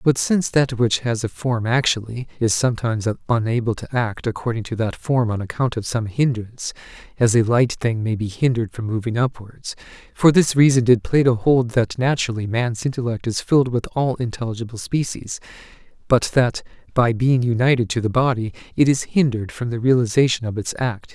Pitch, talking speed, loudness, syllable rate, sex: 120 Hz, 185 wpm, -20 LUFS, 5.5 syllables/s, male